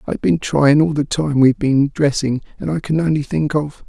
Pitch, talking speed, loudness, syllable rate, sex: 145 Hz, 230 wpm, -17 LUFS, 5.5 syllables/s, male